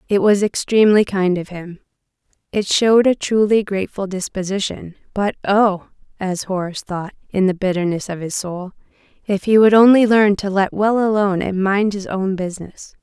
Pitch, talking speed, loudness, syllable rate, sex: 195 Hz, 165 wpm, -17 LUFS, 5.2 syllables/s, female